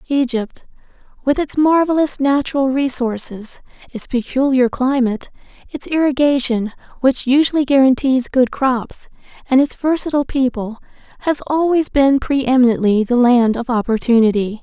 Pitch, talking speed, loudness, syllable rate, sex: 260 Hz, 120 wpm, -16 LUFS, 4.9 syllables/s, female